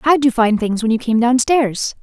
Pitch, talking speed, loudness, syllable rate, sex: 240 Hz, 235 wpm, -16 LUFS, 4.6 syllables/s, female